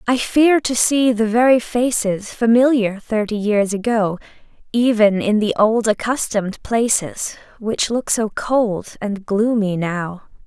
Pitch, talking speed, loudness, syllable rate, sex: 220 Hz, 140 wpm, -18 LUFS, 3.9 syllables/s, female